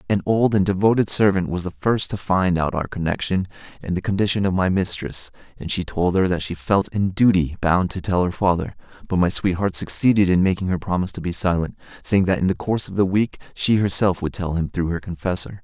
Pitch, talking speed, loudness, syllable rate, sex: 90 Hz, 230 wpm, -21 LUFS, 5.8 syllables/s, male